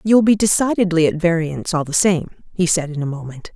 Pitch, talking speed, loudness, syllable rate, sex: 170 Hz, 220 wpm, -17 LUFS, 5.9 syllables/s, female